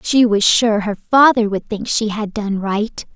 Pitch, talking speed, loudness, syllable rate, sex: 215 Hz, 210 wpm, -16 LUFS, 4.0 syllables/s, female